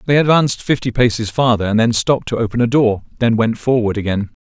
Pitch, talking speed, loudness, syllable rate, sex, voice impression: 120 Hz, 215 wpm, -16 LUFS, 6.3 syllables/s, male, masculine, adult-like, tensed, slightly powerful, hard, intellectual, slightly friendly, wild, lively, strict, slightly sharp